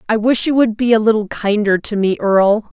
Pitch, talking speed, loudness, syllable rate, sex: 215 Hz, 235 wpm, -15 LUFS, 5.6 syllables/s, female